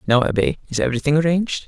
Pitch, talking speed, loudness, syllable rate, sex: 145 Hz, 180 wpm, -19 LUFS, 7.7 syllables/s, male